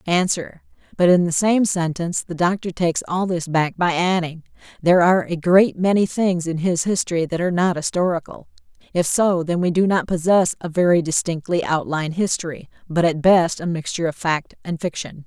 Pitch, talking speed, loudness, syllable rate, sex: 170 Hz, 190 wpm, -20 LUFS, 5.4 syllables/s, female